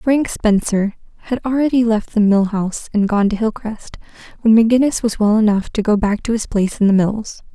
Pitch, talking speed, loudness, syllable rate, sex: 215 Hz, 205 wpm, -16 LUFS, 5.6 syllables/s, female